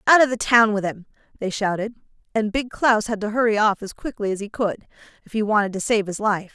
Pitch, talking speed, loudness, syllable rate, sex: 215 Hz, 250 wpm, -21 LUFS, 5.9 syllables/s, female